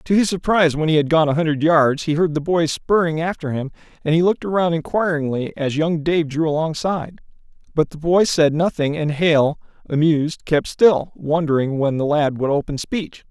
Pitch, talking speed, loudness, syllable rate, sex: 160 Hz, 200 wpm, -19 LUFS, 5.3 syllables/s, male